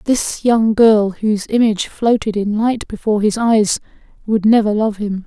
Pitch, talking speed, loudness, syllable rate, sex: 215 Hz, 170 wpm, -15 LUFS, 4.6 syllables/s, female